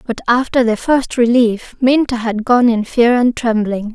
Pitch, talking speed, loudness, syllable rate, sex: 235 Hz, 180 wpm, -14 LUFS, 4.3 syllables/s, female